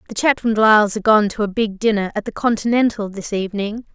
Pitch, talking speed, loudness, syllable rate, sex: 215 Hz, 215 wpm, -18 LUFS, 6.3 syllables/s, female